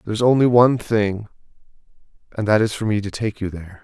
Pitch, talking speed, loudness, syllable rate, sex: 105 Hz, 220 wpm, -19 LUFS, 6.8 syllables/s, male